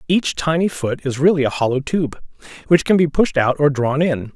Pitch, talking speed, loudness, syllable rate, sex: 150 Hz, 220 wpm, -18 LUFS, 5.1 syllables/s, male